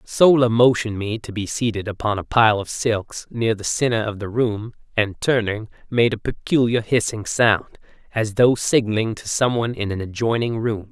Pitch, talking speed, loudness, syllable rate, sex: 110 Hz, 180 wpm, -20 LUFS, 4.9 syllables/s, male